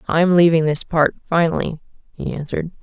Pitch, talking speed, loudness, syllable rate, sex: 165 Hz, 125 wpm, -18 LUFS, 5.5 syllables/s, female